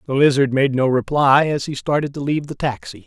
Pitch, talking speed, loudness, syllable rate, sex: 140 Hz, 235 wpm, -18 LUFS, 5.8 syllables/s, male